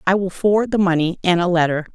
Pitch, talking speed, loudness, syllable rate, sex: 185 Hz, 245 wpm, -18 LUFS, 6.3 syllables/s, female